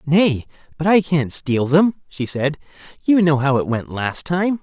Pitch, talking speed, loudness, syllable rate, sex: 155 Hz, 195 wpm, -19 LUFS, 4.1 syllables/s, male